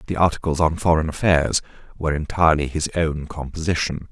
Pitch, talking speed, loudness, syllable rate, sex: 80 Hz, 145 wpm, -21 LUFS, 6.0 syllables/s, male